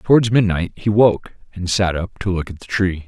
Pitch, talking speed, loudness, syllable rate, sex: 95 Hz, 235 wpm, -18 LUFS, 5.7 syllables/s, male